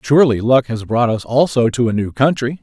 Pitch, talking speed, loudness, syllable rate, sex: 125 Hz, 230 wpm, -15 LUFS, 5.6 syllables/s, male